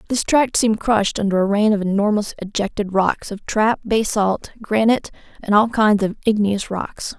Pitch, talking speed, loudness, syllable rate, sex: 210 Hz, 175 wpm, -19 LUFS, 5.0 syllables/s, female